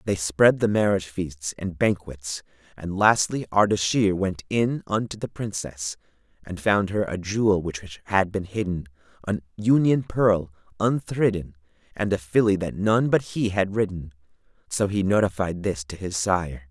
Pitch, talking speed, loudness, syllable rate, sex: 95 Hz, 160 wpm, -24 LUFS, 4.5 syllables/s, male